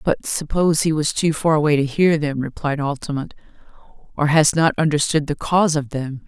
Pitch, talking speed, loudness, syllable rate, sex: 150 Hz, 190 wpm, -19 LUFS, 5.5 syllables/s, female